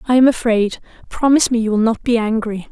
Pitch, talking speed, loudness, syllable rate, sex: 230 Hz, 220 wpm, -16 LUFS, 6.3 syllables/s, female